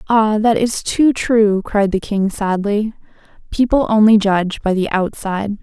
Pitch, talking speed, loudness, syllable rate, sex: 210 Hz, 160 wpm, -16 LUFS, 4.3 syllables/s, female